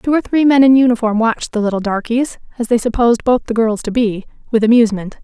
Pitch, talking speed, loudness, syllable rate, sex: 235 Hz, 230 wpm, -14 LUFS, 6.4 syllables/s, female